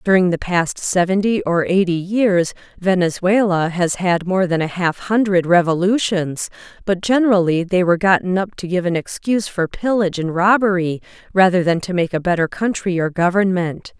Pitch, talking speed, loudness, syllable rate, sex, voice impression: 185 Hz, 165 wpm, -17 LUFS, 5.1 syllables/s, female, very feminine, slightly middle-aged, thin, tensed, powerful, bright, slightly hard, very clear, fluent, cool, intellectual, very refreshing, sincere, calm, friendly, reassuring, unique, very elegant, slightly wild, sweet, slightly lively, very kind, slightly intense, slightly modest